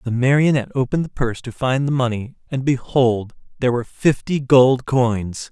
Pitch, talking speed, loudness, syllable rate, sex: 125 Hz, 165 wpm, -19 LUFS, 5.4 syllables/s, male